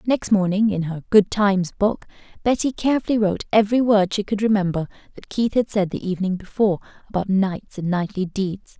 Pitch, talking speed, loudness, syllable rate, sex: 200 Hz, 185 wpm, -21 LUFS, 5.8 syllables/s, female